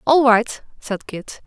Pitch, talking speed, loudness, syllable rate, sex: 235 Hz, 165 wpm, -18 LUFS, 3.5 syllables/s, female